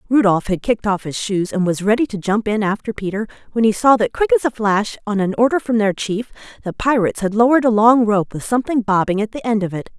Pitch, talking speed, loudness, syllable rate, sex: 215 Hz, 260 wpm, -17 LUFS, 6.2 syllables/s, female